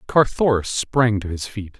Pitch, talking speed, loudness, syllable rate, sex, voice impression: 110 Hz, 165 wpm, -20 LUFS, 4.4 syllables/s, male, very masculine, slightly old, very thick, slightly tensed, slightly relaxed, powerful, bright, soft, very clear, fluent, slightly raspy, cool, very intellectual, refreshing, very sincere, very calm, very mature, very friendly, very reassuring, unique, elegant, slightly wild, slightly lively, kind